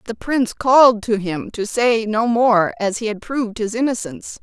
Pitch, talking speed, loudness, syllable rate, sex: 225 Hz, 205 wpm, -18 LUFS, 5.1 syllables/s, female